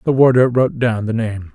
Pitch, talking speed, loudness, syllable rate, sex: 120 Hz, 230 wpm, -16 LUFS, 5.6 syllables/s, male